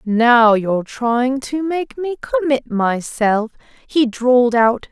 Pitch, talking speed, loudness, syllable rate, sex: 250 Hz, 135 wpm, -17 LUFS, 3.5 syllables/s, female